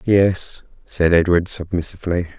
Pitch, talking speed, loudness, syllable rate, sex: 90 Hz, 100 wpm, -19 LUFS, 4.6 syllables/s, male